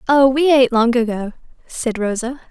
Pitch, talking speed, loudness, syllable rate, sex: 245 Hz, 165 wpm, -16 LUFS, 5.2 syllables/s, female